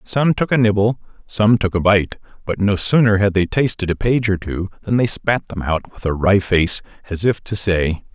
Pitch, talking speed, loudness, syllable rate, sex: 100 Hz, 230 wpm, -18 LUFS, 4.9 syllables/s, male